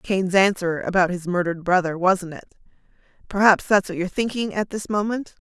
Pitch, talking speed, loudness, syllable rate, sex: 190 Hz, 175 wpm, -21 LUFS, 5.6 syllables/s, female